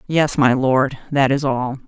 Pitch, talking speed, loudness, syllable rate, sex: 135 Hz, 190 wpm, -18 LUFS, 3.8 syllables/s, female